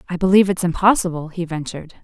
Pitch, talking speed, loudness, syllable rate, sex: 175 Hz, 175 wpm, -18 LUFS, 7.3 syllables/s, female